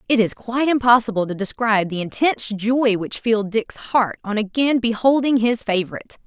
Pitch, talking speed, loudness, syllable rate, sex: 225 Hz, 170 wpm, -19 LUFS, 5.6 syllables/s, female